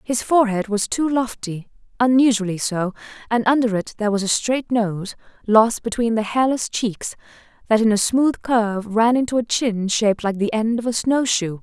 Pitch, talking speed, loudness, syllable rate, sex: 225 Hz, 180 wpm, -20 LUFS, 5.0 syllables/s, female